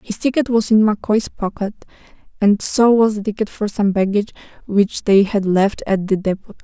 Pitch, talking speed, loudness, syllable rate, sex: 210 Hz, 190 wpm, -17 LUFS, 5.1 syllables/s, female